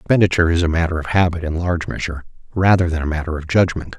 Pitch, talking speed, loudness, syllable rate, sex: 85 Hz, 225 wpm, -18 LUFS, 7.7 syllables/s, male